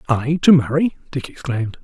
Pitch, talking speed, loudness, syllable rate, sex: 140 Hz, 165 wpm, -17 LUFS, 5.4 syllables/s, male